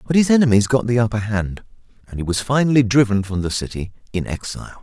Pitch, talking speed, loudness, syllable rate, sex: 115 Hz, 210 wpm, -19 LUFS, 6.7 syllables/s, male